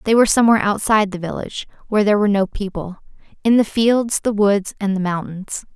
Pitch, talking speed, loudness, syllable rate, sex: 205 Hz, 190 wpm, -18 LUFS, 6.5 syllables/s, female